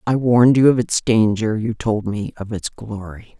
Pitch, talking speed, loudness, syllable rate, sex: 115 Hz, 210 wpm, -18 LUFS, 4.6 syllables/s, female